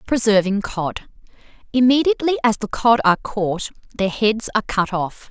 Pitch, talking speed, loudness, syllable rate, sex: 215 Hz, 135 wpm, -19 LUFS, 5.1 syllables/s, female